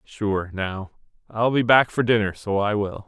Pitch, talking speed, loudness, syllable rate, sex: 105 Hz, 195 wpm, -22 LUFS, 4.2 syllables/s, male